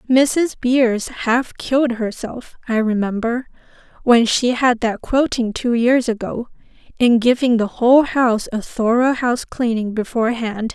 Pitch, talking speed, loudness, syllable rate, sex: 240 Hz, 140 wpm, -18 LUFS, 4.3 syllables/s, female